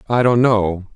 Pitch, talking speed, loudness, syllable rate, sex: 110 Hz, 190 wpm, -16 LUFS, 4.1 syllables/s, male